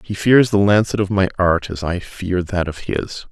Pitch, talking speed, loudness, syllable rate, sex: 95 Hz, 235 wpm, -18 LUFS, 4.5 syllables/s, male